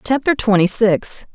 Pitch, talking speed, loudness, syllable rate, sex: 220 Hz, 135 wpm, -16 LUFS, 4.2 syllables/s, female